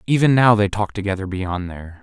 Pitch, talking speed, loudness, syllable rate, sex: 100 Hz, 205 wpm, -19 LUFS, 5.8 syllables/s, male